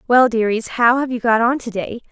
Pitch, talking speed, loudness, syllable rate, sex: 235 Hz, 225 wpm, -17 LUFS, 5.4 syllables/s, female